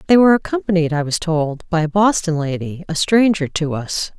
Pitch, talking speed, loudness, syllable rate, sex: 170 Hz, 200 wpm, -17 LUFS, 5.4 syllables/s, female